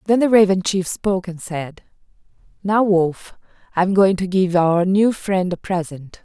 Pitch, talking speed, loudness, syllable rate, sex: 185 Hz, 185 wpm, -18 LUFS, 4.5 syllables/s, female